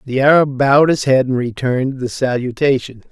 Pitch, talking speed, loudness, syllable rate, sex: 130 Hz, 175 wpm, -15 LUFS, 5.4 syllables/s, male